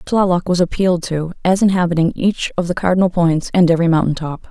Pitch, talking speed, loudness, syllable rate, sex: 175 Hz, 200 wpm, -16 LUFS, 6.1 syllables/s, female